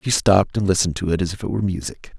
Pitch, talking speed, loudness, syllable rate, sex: 95 Hz, 300 wpm, -20 LUFS, 7.8 syllables/s, male